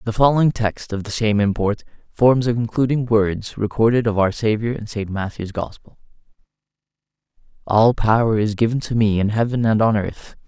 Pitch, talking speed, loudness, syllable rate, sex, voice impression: 110 Hz, 170 wpm, -19 LUFS, 5.2 syllables/s, male, very masculine, very adult-like, slightly middle-aged, very thick, slightly tensed, slightly powerful, bright, slightly soft, clear, fluent, slightly raspy, very cool, intellectual, refreshing, very sincere, very calm, mature, very friendly, very reassuring, very unique, very elegant, wild, very sweet, lively, very kind, slightly intense, slightly modest, slightly light